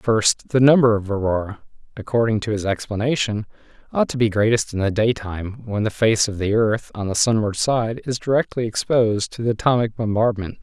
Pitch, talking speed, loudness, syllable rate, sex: 110 Hz, 185 wpm, -20 LUFS, 5.5 syllables/s, male